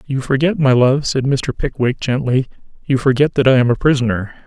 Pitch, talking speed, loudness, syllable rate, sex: 130 Hz, 200 wpm, -16 LUFS, 5.4 syllables/s, male